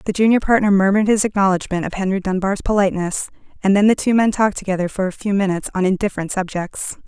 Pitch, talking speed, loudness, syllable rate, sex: 195 Hz, 205 wpm, -18 LUFS, 7.0 syllables/s, female